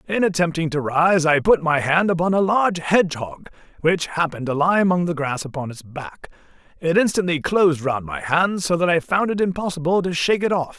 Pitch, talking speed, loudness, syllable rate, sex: 165 Hz, 210 wpm, -20 LUFS, 5.6 syllables/s, male